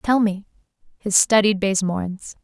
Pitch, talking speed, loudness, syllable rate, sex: 200 Hz, 125 wpm, -19 LUFS, 5.0 syllables/s, female